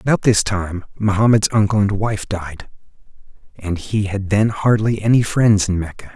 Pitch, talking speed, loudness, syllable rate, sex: 105 Hz, 165 wpm, -17 LUFS, 4.7 syllables/s, male